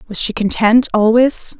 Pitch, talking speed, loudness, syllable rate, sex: 225 Hz, 150 wpm, -13 LUFS, 4.4 syllables/s, female